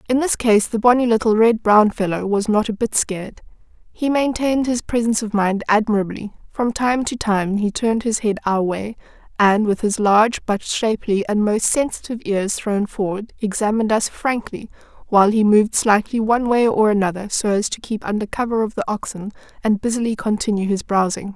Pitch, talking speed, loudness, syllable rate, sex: 215 Hz, 190 wpm, -19 LUFS, 5.5 syllables/s, female